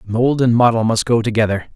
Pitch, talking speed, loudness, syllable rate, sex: 115 Hz, 205 wpm, -16 LUFS, 5.6 syllables/s, male